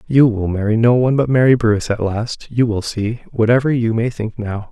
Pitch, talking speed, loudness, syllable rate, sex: 115 Hz, 230 wpm, -16 LUFS, 5.4 syllables/s, male